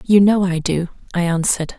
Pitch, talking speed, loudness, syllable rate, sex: 180 Hz, 200 wpm, -18 LUFS, 5.6 syllables/s, female